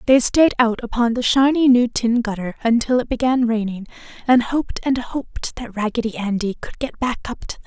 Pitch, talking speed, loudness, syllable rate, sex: 240 Hz, 205 wpm, -19 LUFS, 5.4 syllables/s, female